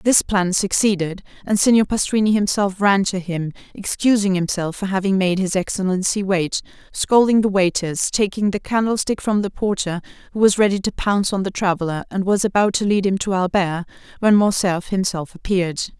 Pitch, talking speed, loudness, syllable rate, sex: 195 Hz, 175 wpm, -19 LUFS, 5.4 syllables/s, female